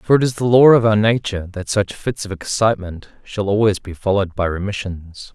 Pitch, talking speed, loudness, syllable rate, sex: 100 Hz, 215 wpm, -18 LUFS, 5.6 syllables/s, male